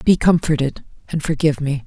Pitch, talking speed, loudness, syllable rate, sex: 150 Hz, 160 wpm, -19 LUFS, 5.8 syllables/s, female